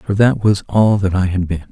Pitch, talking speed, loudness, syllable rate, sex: 100 Hz, 280 wpm, -15 LUFS, 4.9 syllables/s, male